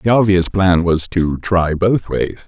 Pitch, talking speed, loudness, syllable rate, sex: 90 Hz, 195 wpm, -15 LUFS, 3.7 syllables/s, male